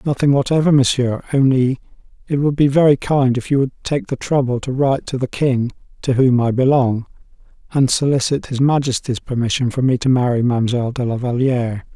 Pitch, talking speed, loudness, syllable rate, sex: 130 Hz, 185 wpm, -17 LUFS, 5.7 syllables/s, male